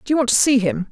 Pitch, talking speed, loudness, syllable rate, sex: 245 Hz, 395 wpm, -16 LUFS, 7.4 syllables/s, female